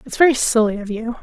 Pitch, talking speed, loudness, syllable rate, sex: 235 Hz, 245 wpm, -17 LUFS, 6.5 syllables/s, female